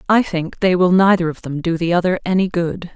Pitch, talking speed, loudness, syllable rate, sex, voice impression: 175 Hz, 245 wpm, -17 LUFS, 5.6 syllables/s, female, very feminine, adult-like, slightly middle-aged, thin, tensed, slightly powerful, bright, hard, very clear, very fluent, cool, very intellectual, very refreshing, sincere, very calm, very friendly, very reassuring, slightly unique, elegant, slightly sweet, slightly lively, slightly sharp